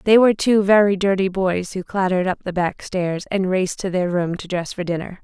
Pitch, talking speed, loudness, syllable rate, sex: 185 Hz, 240 wpm, -20 LUFS, 5.6 syllables/s, female